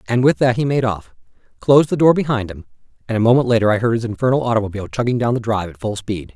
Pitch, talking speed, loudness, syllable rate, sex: 115 Hz, 255 wpm, -17 LUFS, 7.4 syllables/s, male